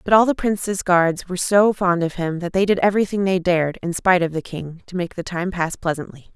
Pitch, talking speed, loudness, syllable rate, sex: 180 Hz, 255 wpm, -20 LUFS, 5.8 syllables/s, female